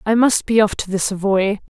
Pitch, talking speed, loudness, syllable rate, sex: 205 Hz, 235 wpm, -17 LUFS, 5.3 syllables/s, female